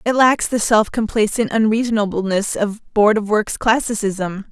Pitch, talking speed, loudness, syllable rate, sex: 215 Hz, 145 wpm, -17 LUFS, 4.5 syllables/s, female